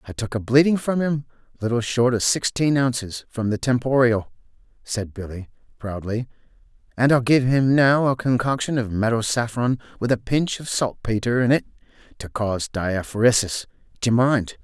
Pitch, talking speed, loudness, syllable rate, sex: 120 Hz, 160 wpm, -21 LUFS, 5.0 syllables/s, male